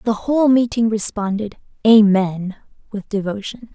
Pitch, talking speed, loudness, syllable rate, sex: 215 Hz, 110 wpm, -17 LUFS, 4.6 syllables/s, female